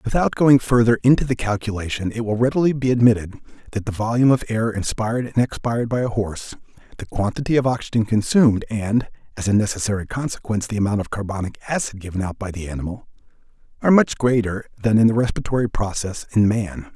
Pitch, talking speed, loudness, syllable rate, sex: 110 Hz, 185 wpm, -20 LUFS, 6.4 syllables/s, male